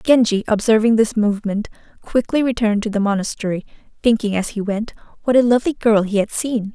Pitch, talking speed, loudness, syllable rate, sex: 220 Hz, 180 wpm, -18 LUFS, 6.1 syllables/s, female